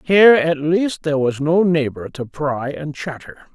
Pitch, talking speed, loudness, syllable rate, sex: 155 Hz, 185 wpm, -18 LUFS, 4.6 syllables/s, male